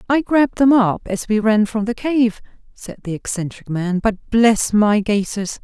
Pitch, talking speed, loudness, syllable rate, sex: 220 Hz, 190 wpm, -17 LUFS, 4.4 syllables/s, female